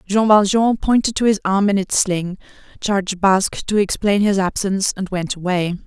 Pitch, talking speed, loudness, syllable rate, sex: 195 Hz, 185 wpm, -18 LUFS, 4.9 syllables/s, female